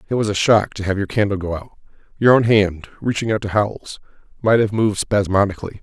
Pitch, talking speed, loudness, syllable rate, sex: 100 Hz, 215 wpm, -18 LUFS, 6.4 syllables/s, male